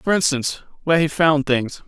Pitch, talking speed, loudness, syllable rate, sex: 150 Hz, 190 wpm, -19 LUFS, 5.8 syllables/s, male